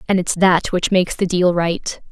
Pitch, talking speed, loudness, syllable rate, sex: 180 Hz, 225 wpm, -17 LUFS, 4.8 syllables/s, female